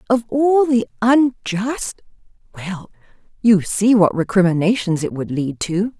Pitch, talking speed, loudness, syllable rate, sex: 210 Hz, 120 wpm, -17 LUFS, 4.0 syllables/s, female